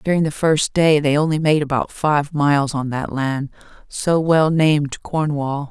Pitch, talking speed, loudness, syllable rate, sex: 150 Hz, 180 wpm, -18 LUFS, 4.4 syllables/s, female